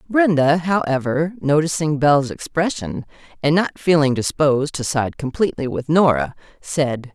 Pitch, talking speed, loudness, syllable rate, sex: 150 Hz, 125 wpm, -19 LUFS, 4.8 syllables/s, female